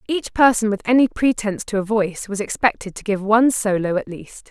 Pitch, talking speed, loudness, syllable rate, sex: 215 Hz, 215 wpm, -19 LUFS, 5.8 syllables/s, female